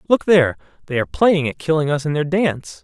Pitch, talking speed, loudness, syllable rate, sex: 155 Hz, 235 wpm, -18 LUFS, 6.4 syllables/s, male